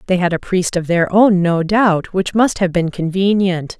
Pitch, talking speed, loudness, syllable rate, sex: 185 Hz, 220 wpm, -15 LUFS, 4.4 syllables/s, female